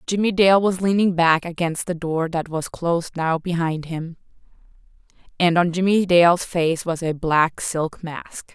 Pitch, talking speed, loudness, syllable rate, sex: 170 Hz, 160 wpm, -20 LUFS, 4.3 syllables/s, female